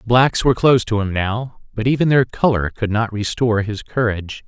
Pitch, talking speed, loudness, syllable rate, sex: 115 Hz, 215 wpm, -18 LUFS, 5.6 syllables/s, male